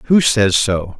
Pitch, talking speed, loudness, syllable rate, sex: 110 Hz, 180 wpm, -14 LUFS, 3.2 syllables/s, male